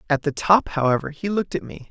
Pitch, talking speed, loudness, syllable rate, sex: 155 Hz, 250 wpm, -21 LUFS, 6.4 syllables/s, male